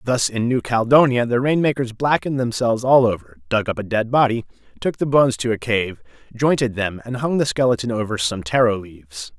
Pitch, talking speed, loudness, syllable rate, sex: 115 Hz, 205 wpm, -19 LUFS, 5.8 syllables/s, male